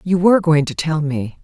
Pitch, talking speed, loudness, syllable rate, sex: 160 Hz, 250 wpm, -16 LUFS, 5.3 syllables/s, female